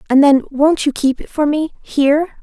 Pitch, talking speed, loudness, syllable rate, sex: 290 Hz, 175 wpm, -15 LUFS, 4.8 syllables/s, female